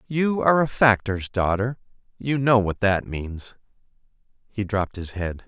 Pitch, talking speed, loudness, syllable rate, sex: 110 Hz, 155 wpm, -23 LUFS, 4.5 syllables/s, male